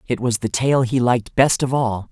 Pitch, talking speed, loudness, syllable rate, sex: 120 Hz, 255 wpm, -19 LUFS, 5.1 syllables/s, male